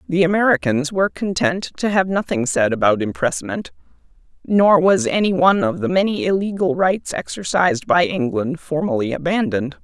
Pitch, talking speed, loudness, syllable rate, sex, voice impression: 190 Hz, 145 wpm, -18 LUFS, 5.3 syllables/s, female, feminine, adult-like, powerful, slightly soft, fluent, raspy, intellectual, friendly, slightly reassuring, kind, modest